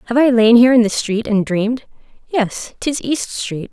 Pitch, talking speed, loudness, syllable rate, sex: 230 Hz, 210 wpm, -16 LUFS, 4.9 syllables/s, female